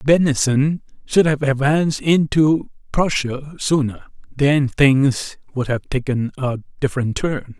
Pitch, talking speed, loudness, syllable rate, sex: 140 Hz, 120 wpm, -19 LUFS, 4.1 syllables/s, male